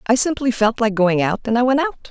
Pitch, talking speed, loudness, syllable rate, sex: 235 Hz, 285 wpm, -18 LUFS, 5.6 syllables/s, female